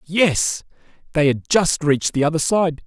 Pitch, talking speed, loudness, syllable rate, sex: 160 Hz, 170 wpm, -19 LUFS, 4.5 syllables/s, male